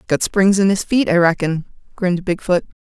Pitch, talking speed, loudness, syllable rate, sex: 185 Hz, 210 wpm, -17 LUFS, 5.4 syllables/s, female